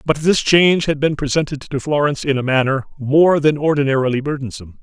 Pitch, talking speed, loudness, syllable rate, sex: 145 Hz, 185 wpm, -17 LUFS, 6.2 syllables/s, male